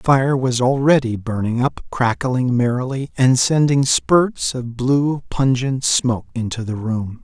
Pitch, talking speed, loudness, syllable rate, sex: 125 Hz, 150 wpm, -18 LUFS, 4.0 syllables/s, male